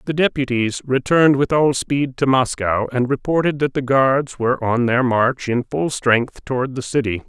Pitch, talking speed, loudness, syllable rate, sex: 130 Hz, 190 wpm, -18 LUFS, 4.7 syllables/s, male